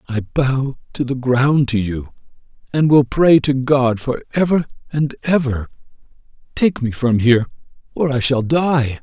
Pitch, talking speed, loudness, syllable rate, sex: 135 Hz, 160 wpm, -17 LUFS, 4.2 syllables/s, male